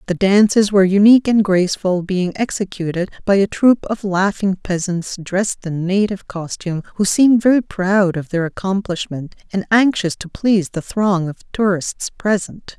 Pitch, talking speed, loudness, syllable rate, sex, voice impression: 195 Hz, 160 wpm, -17 LUFS, 5.0 syllables/s, female, very feminine, very middle-aged, slightly thin, slightly relaxed, powerful, slightly dark, soft, clear, fluent, slightly cool, very intellectual, slightly refreshing, very sincere, very calm, friendly, reassuring, slightly unique, very elegant, slightly wild, sweet, lively, very kind, slightly modest, slightly light